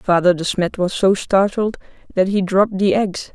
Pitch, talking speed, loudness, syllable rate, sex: 190 Hz, 195 wpm, -18 LUFS, 4.8 syllables/s, female